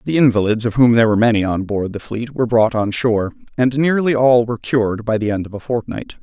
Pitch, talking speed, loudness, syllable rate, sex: 115 Hz, 250 wpm, -17 LUFS, 6.5 syllables/s, male